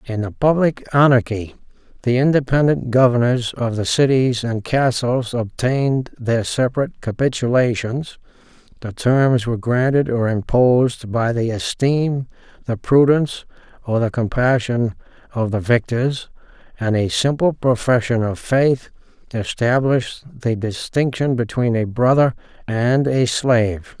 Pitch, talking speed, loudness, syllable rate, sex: 125 Hz, 120 wpm, -18 LUFS, 4.4 syllables/s, male